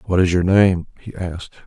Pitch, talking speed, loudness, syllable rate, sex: 90 Hz, 215 wpm, -18 LUFS, 5.7 syllables/s, male